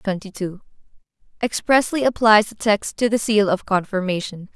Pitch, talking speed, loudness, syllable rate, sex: 205 Hz, 145 wpm, -20 LUFS, 4.9 syllables/s, female